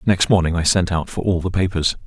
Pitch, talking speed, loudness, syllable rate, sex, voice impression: 85 Hz, 260 wpm, -19 LUFS, 5.9 syllables/s, male, masculine, adult-like, tensed, slightly powerful, dark, slightly muffled, cool, sincere, wild, slightly lively, slightly kind, modest